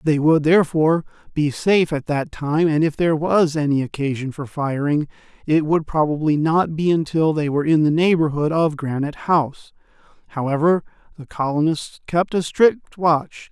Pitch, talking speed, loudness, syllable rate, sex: 155 Hz, 165 wpm, -19 LUFS, 5.1 syllables/s, male